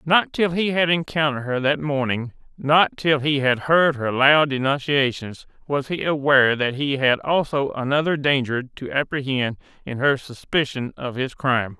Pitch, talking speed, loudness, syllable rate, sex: 140 Hz, 160 wpm, -21 LUFS, 4.8 syllables/s, male